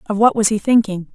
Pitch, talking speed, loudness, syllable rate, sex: 210 Hz, 265 wpm, -16 LUFS, 6.0 syllables/s, female